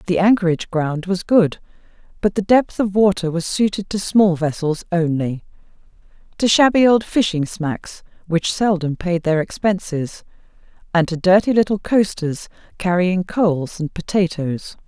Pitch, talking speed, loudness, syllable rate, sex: 180 Hz, 135 wpm, -18 LUFS, 4.6 syllables/s, female